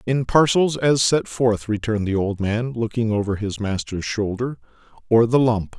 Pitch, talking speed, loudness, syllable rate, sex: 115 Hz, 175 wpm, -21 LUFS, 4.7 syllables/s, male